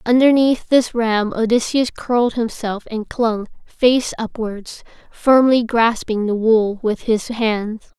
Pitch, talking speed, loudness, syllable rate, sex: 230 Hz, 130 wpm, -17 LUFS, 3.6 syllables/s, female